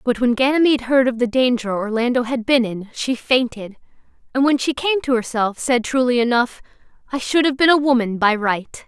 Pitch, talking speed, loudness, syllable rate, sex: 250 Hz, 205 wpm, -18 LUFS, 5.3 syllables/s, female